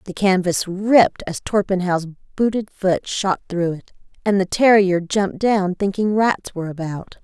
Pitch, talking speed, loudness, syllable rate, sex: 190 Hz, 160 wpm, -19 LUFS, 4.3 syllables/s, female